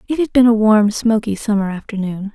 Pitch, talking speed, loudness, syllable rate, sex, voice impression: 215 Hz, 205 wpm, -16 LUFS, 5.5 syllables/s, female, very feminine, very adult-like, middle-aged, thin, tensed, slightly powerful, bright, slightly soft, clear, fluent, cute, intellectual, very refreshing, sincere, calm, very friendly, very reassuring, slightly unique, very elegant, sweet, lively, kind, slightly intense, light